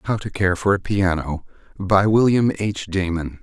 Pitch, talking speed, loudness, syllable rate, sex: 100 Hz, 175 wpm, -20 LUFS, 4.4 syllables/s, male